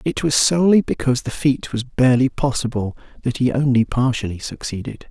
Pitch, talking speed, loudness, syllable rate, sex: 130 Hz, 165 wpm, -19 LUFS, 5.7 syllables/s, male